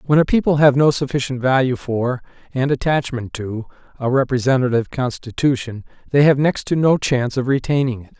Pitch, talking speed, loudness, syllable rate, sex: 130 Hz, 170 wpm, -18 LUFS, 5.7 syllables/s, male